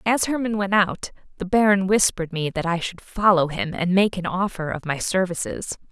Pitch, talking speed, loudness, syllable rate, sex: 190 Hz, 205 wpm, -22 LUFS, 5.2 syllables/s, female